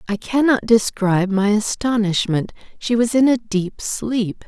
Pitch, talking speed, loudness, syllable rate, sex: 220 Hz, 145 wpm, -18 LUFS, 4.2 syllables/s, female